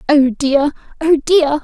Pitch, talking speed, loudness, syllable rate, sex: 295 Hz, 145 wpm, -15 LUFS, 3.5 syllables/s, female